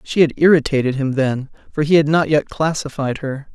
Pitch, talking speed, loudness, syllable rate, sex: 145 Hz, 205 wpm, -17 LUFS, 5.4 syllables/s, male